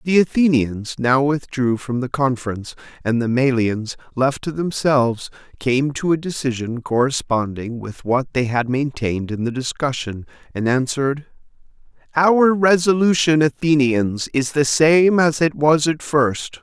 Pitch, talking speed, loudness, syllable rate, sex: 135 Hz, 140 wpm, -19 LUFS, 4.4 syllables/s, male